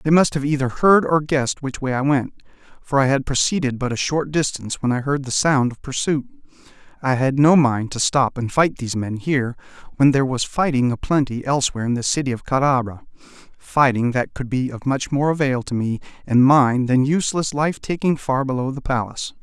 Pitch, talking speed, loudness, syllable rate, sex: 135 Hz, 205 wpm, -20 LUFS, 5.7 syllables/s, male